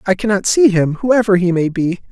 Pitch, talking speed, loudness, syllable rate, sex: 195 Hz, 225 wpm, -14 LUFS, 5.2 syllables/s, male